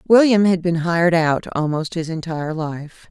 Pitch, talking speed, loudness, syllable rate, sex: 170 Hz, 175 wpm, -19 LUFS, 4.8 syllables/s, female